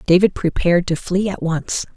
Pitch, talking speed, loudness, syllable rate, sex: 180 Hz, 185 wpm, -19 LUFS, 5.1 syllables/s, female